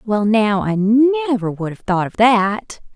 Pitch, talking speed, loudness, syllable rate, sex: 220 Hz, 185 wpm, -16 LUFS, 3.7 syllables/s, female